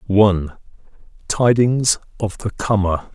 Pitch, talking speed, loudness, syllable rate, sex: 105 Hz, 75 wpm, -18 LUFS, 5.0 syllables/s, male